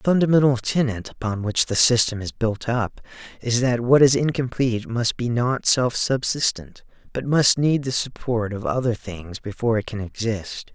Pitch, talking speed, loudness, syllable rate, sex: 120 Hz, 180 wpm, -21 LUFS, 4.8 syllables/s, male